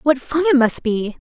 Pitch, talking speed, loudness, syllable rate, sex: 265 Hz, 235 wpm, -17 LUFS, 4.8 syllables/s, female